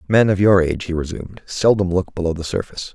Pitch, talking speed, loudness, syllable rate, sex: 90 Hz, 225 wpm, -19 LUFS, 6.6 syllables/s, male